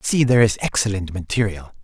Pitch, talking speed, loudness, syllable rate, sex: 105 Hz, 195 wpm, -19 LUFS, 6.8 syllables/s, male